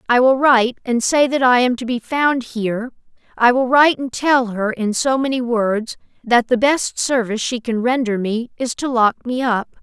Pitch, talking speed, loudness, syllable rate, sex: 245 Hz, 215 wpm, -17 LUFS, 4.8 syllables/s, female